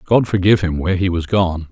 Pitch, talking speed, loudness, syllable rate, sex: 90 Hz, 245 wpm, -17 LUFS, 6.2 syllables/s, male